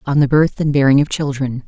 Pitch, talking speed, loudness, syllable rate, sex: 140 Hz, 250 wpm, -15 LUFS, 5.8 syllables/s, female